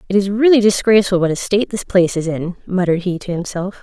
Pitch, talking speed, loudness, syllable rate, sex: 190 Hz, 235 wpm, -16 LUFS, 6.7 syllables/s, female